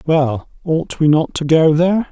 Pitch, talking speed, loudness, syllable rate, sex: 160 Hz, 200 wpm, -15 LUFS, 4.4 syllables/s, male